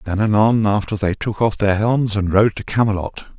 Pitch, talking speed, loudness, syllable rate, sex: 105 Hz, 230 wpm, -18 LUFS, 5.4 syllables/s, male